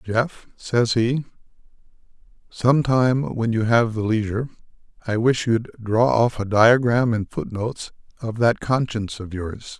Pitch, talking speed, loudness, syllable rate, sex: 115 Hz, 155 wpm, -21 LUFS, 4.2 syllables/s, male